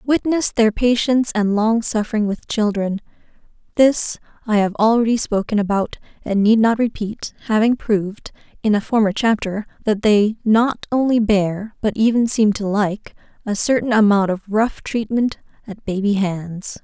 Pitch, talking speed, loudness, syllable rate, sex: 215 Hz, 145 wpm, -18 LUFS, 4.5 syllables/s, female